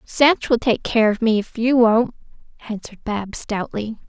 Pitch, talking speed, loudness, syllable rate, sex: 225 Hz, 175 wpm, -19 LUFS, 4.4 syllables/s, female